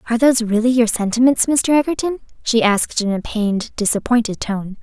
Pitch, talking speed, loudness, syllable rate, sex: 230 Hz, 175 wpm, -17 LUFS, 6.0 syllables/s, female